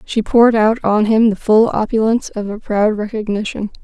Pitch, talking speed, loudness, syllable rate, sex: 215 Hz, 190 wpm, -15 LUFS, 5.4 syllables/s, female